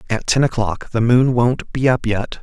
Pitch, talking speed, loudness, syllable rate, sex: 120 Hz, 225 wpm, -17 LUFS, 4.5 syllables/s, male